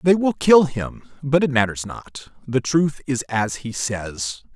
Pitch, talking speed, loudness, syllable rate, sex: 130 Hz, 185 wpm, -20 LUFS, 3.8 syllables/s, male